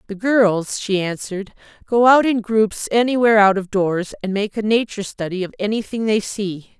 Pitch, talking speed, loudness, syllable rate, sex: 210 Hz, 185 wpm, -18 LUFS, 5.1 syllables/s, female